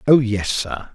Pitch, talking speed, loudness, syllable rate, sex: 115 Hz, 190 wpm, -20 LUFS, 3.8 syllables/s, male